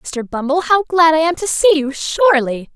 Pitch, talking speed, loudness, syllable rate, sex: 290 Hz, 240 wpm, -15 LUFS, 4.6 syllables/s, female